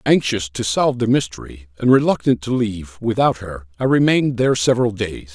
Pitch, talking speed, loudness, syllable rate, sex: 110 Hz, 180 wpm, -18 LUFS, 5.8 syllables/s, male